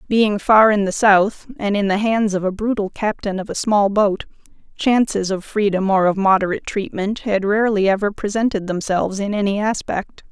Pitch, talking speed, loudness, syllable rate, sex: 205 Hz, 185 wpm, -18 LUFS, 5.2 syllables/s, female